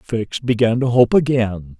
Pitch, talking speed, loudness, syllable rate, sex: 115 Hz, 165 wpm, -17 LUFS, 4.0 syllables/s, male